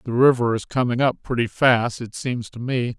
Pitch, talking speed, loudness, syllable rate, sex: 120 Hz, 220 wpm, -21 LUFS, 5.0 syllables/s, male